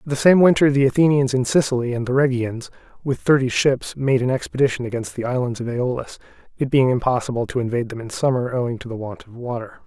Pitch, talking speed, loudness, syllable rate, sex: 125 Hz, 215 wpm, -20 LUFS, 6.4 syllables/s, male